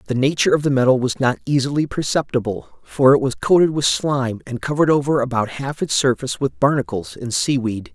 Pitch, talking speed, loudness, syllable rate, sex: 135 Hz, 205 wpm, -19 LUFS, 5.9 syllables/s, male